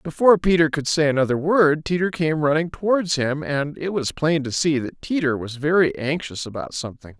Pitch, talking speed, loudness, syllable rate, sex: 155 Hz, 200 wpm, -21 LUFS, 5.3 syllables/s, male